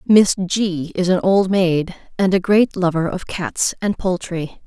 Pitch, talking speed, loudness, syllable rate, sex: 185 Hz, 180 wpm, -18 LUFS, 3.8 syllables/s, female